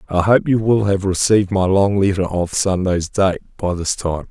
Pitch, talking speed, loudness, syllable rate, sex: 95 Hz, 210 wpm, -17 LUFS, 4.9 syllables/s, male